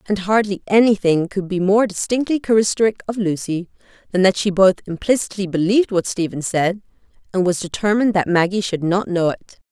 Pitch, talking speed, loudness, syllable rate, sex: 195 Hz, 175 wpm, -18 LUFS, 6.1 syllables/s, female